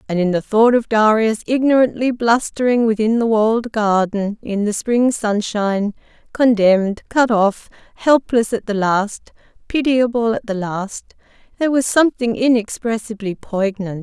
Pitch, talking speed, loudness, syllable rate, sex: 220 Hz, 135 wpm, -17 LUFS, 4.6 syllables/s, female